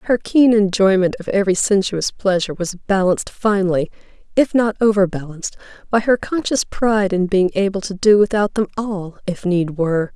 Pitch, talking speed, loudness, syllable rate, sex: 200 Hz, 165 wpm, -17 LUFS, 5.3 syllables/s, female